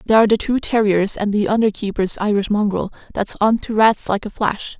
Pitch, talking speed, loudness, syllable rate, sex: 210 Hz, 225 wpm, -18 LUFS, 5.6 syllables/s, female